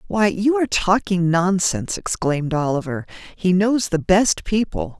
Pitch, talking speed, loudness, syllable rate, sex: 185 Hz, 145 wpm, -19 LUFS, 4.6 syllables/s, female